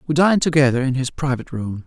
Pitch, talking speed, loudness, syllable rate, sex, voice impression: 140 Hz, 225 wpm, -19 LUFS, 7.0 syllables/s, male, masculine, very adult-like, slightly weak, cool, sincere, very calm, wild